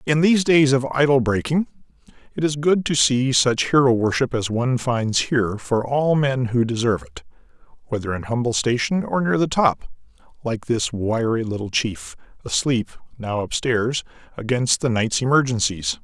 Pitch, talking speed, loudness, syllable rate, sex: 125 Hz, 170 wpm, -20 LUFS, 4.9 syllables/s, male